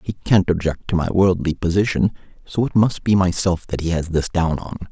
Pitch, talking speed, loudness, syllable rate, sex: 90 Hz, 220 wpm, -19 LUFS, 5.3 syllables/s, male